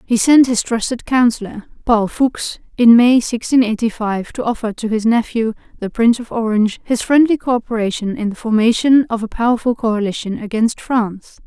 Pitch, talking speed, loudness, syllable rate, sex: 230 Hz, 175 wpm, -16 LUFS, 5.4 syllables/s, female